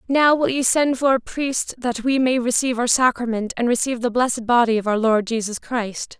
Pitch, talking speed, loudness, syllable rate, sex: 245 Hz, 225 wpm, -20 LUFS, 5.4 syllables/s, female